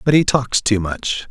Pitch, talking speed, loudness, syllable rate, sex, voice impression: 120 Hz, 230 wpm, -18 LUFS, 4.3 syllables/s, male, very masculine, very adult-like, very thick, tensed, slightly powerful, slightly dark, soft, slightly muffled, fluent, slightly raspy, very cool, intellectual, refreshing, very sincere, very calm, mature, friendly, reassuring, unique, elegant, slightly wild, sweet, lively, kind